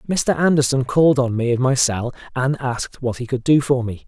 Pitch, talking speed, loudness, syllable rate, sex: 130 Hz, 235 wpm, -19 LUFS, 5.5 syllables/s, male